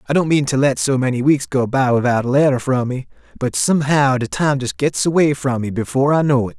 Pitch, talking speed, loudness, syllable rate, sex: 135 Hz, 255 wpm, -17 LUFS, 6.0 syllables/s, male